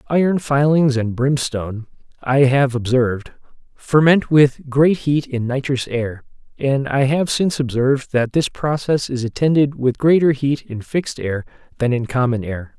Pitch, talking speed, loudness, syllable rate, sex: 135 Hz, 160 wpm, -18 LUFS, 4.6 syllables/s, male